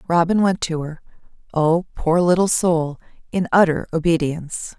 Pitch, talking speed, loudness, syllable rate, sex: 170 Hz, 115 wpm, -19 LUFS, 4.8 syllables/s, female